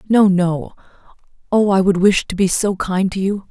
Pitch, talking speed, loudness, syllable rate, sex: 190 Hz, 205 wpm, -16 LUFS, 4.7 syllables/s, female